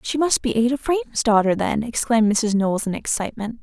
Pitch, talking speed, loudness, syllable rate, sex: 230 Hz, 200 wpm, -20 LUFS, 6.0 syllables/s, female